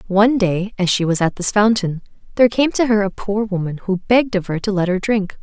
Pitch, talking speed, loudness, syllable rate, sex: 200 Hz, 255 wpm, -17 LUFS, 5.8 syllables/s, female